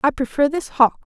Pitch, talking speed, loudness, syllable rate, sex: 280 Hz, 200 wpm, -19 LUFS, 5.2 syllables/s, female